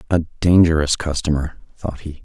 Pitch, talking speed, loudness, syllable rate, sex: 80 Hz, 135 wpm, -18 LUFS, 5.2 syllables/s, male